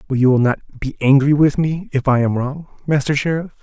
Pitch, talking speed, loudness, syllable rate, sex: 140 Hz, 230 wpm, -17 LUFS, 5.8 syllables/s, male